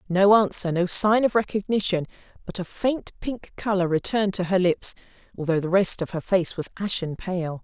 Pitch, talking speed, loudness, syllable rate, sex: 190 Hz, 190 wpm, -23 LUFS, 5.2 syllables/s, female